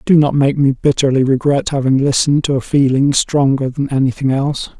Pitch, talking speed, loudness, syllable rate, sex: 140 Hz, 190 wpm, -14 LUFS, 5.6 syllables/s, male